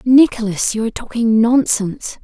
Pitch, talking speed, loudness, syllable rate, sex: 230 Hz, 135 wpm, -16 LUFS, 5.2 syllables/s, female